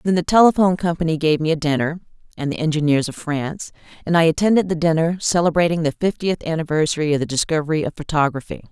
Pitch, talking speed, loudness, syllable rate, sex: 160 Hz, 185 wpm, -19 LUFS, 6.7 syllables/s, female